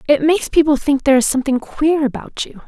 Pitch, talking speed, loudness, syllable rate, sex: 285 Hz, 225 wpm, -16 LUFS, 6.5 syllables/s, female